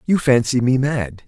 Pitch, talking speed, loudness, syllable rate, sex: 130 Hz, 190 wpm, -18 LUFS, 4.4 syllables/s, male